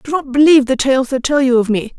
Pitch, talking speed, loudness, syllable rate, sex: 265 Hz, 300 wpm, -13 LUFS, 6.2 syllables/s, female